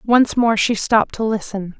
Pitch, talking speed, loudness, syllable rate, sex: 220 Hz, 200 wpm, -17 LUFS, 4.6 syllables/s, female